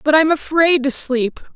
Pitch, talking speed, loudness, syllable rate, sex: 290 Hz, 195 wpm, -16 LUFS, 4.4 syllables/s, female